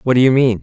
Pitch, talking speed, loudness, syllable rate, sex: 120 Hz, 385 wpm, -13 LUFS, 6.8 syllables/s, male